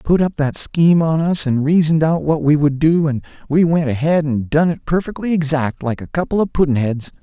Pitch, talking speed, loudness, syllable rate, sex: 155 Hz, 230 wpm, -17 LUFS, 5.5 syllables/s, male